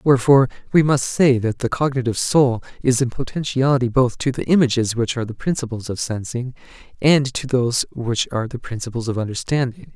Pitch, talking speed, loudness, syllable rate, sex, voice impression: 125 Hz, 180 wpm, -19 LUFS, 6.0 syllables/s, male, very masculine, very adult-like, slightly middle-aged, thick, slightly tensed, slightly weak, slightly dark, very soft, slightly muffled, fluent, slightly raspy, cool, very intellectual, slightly refreshing, sincere, calm, slightly mature, friendly, reassuring, very unique, elegant, sweet, slightly lively, kind, slightly modest